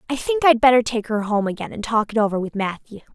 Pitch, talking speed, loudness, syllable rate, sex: 230 Hz, 265 wpm, -20 LUFS, 6.4 syllables/s, female